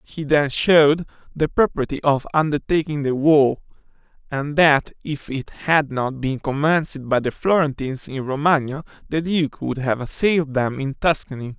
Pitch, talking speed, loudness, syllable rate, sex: 145 Hz, 155 wpm, -20 LUFS, 4.7 syllables/s, male